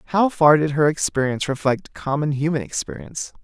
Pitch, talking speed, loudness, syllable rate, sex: 150 Hz, 155 wpm, -20 LUFS, 5.9 syllables/s, male